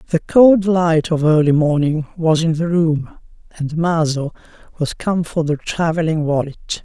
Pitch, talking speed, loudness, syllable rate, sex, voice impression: 160 Hz, 160 wpm, -17 LUFS, 4.3 syllables/s, male, masculine, middle-aged, slightly sincere, slightly friendly, slightly unique